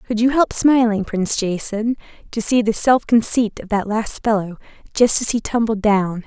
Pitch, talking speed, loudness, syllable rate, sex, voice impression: 220 Hz, 190 wpm, -18 LUFS, 4.9 syllables/s, female, feminine, adult-like, slightly relaxed, powerful, slightly dark, clear, intellectual, calm, reassuring, elegant, kind, modest